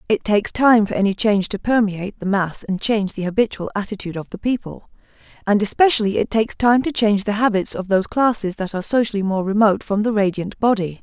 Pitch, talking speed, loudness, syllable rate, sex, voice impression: 210 Hz, 210 wpm, -19 LUFS, 6.4 syllables/s, female, feminine, slightly adult-like, fluent, slightly cute, slightly intellectual, slightly elegant